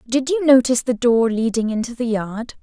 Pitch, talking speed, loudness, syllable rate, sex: 240 Hz, 205 wpm, -18 LUFS, 5.2 syllables/s, female